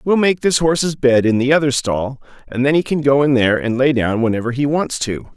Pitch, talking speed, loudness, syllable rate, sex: 135 Hz, 255 wpm, -16 LUFS, 5.6 syllables/s, male